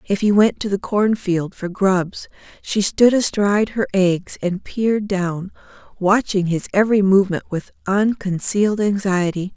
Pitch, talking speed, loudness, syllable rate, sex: 195 Hz, 150 wpm, -19 LUFS, 4.5 syllables/s, female